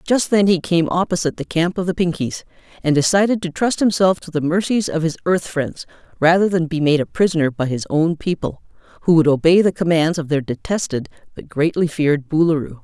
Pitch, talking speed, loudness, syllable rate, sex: 165 Hz, 205 wpm, -18 LUFS, 5.8 syllables/s, female